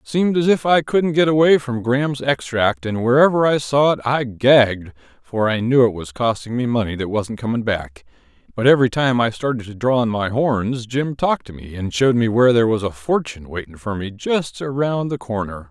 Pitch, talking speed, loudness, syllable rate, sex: 120 Hz, 220 wpm, -18 LUFS, 5.4 syllables/s, male